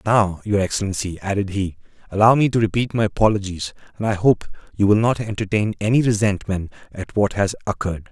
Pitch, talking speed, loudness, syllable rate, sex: 100 Hz, 185 wpm, -20 LUFS, 6.1 syllables/s, male